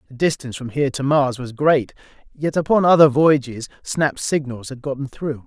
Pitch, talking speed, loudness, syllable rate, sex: 140 Hz, 185 wpm, -19 LUFS, 5.2 syllables/s, male